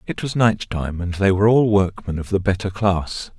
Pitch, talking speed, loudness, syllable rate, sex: 95 Hz, 215 wpm, -20 LUFS, 5.1 syllables/s, male